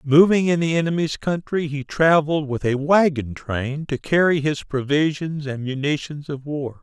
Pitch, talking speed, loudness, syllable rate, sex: 150 Hz, 165 wpm, -21 LUFS, 4.6 syllables/s, male